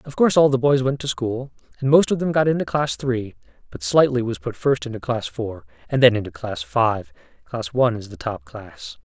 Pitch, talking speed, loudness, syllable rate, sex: 120 Hz, 230 wpm, -21 LUFS, 5.3 syllables/s, male